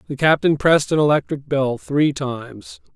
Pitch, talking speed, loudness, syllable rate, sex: 140 Hz, 160 wpm, -18 LUFS, 4.9 syllables/s, male